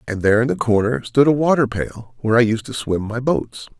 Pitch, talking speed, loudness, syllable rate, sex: 120 Hz, 235 wpm, -18 LUFS, 5.9 syllables/s, male